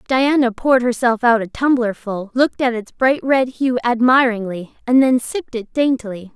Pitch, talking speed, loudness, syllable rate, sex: 240 Hz, 170 wpm, -17 LUFS, 5.0 syllables/s, female